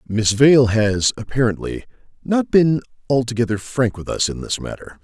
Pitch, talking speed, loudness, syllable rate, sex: 120 Hz, 155 wpm, -18 LUFS, 4.8 syllables/s, male